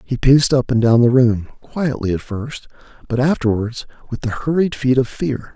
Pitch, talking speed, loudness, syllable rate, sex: 125 Hz, 195 wpm, -17 LUFS, 4.9 syllables/s, male